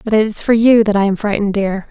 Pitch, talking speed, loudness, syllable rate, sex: 210 Hz, 315 wpm, -14 LUFS, 6.6 syllables/s, female